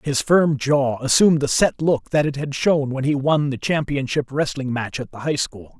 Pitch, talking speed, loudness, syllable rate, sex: 140 Hz, 230 wpm, -20 LUFS, 4.8 syllables/s, male